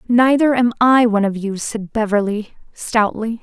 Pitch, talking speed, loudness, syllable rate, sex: 225 Hz, 160 wpm, -17 LUFS, 4.6 syllables/s, female